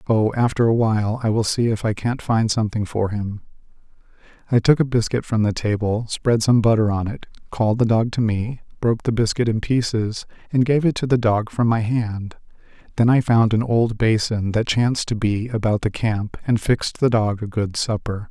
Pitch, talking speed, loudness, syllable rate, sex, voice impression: 110 Hz, 215 wpm, -20 LUFS, 5.2 syllables/s, male, masculine, very adult-like, slightly thick, cool, sincere, calm, slightly sweet, slightly kind